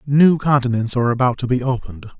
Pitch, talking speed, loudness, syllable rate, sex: 125 Hz, 190 wpm, -17 LUFS, 6.5 syllables/s, male